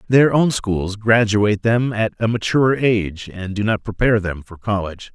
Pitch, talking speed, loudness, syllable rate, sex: 105 Hz, 185 wpm, -18 LUFS, 5.1 syllables/s, male